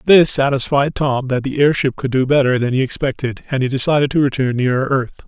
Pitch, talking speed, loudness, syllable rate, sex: 135 Hz, 215 wpm, -16 LUFS, 5.8 syllables/s, male